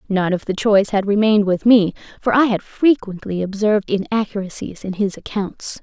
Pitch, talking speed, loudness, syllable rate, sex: 205 Hz, 175 wpm, -18 LUFS, 5.4 syllables/s, female